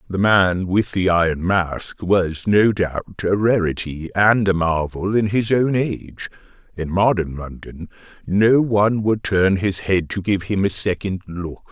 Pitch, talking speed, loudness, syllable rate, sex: 95 Hz, 170 wpm, -19 LUFS, 4.0 syllables/s, male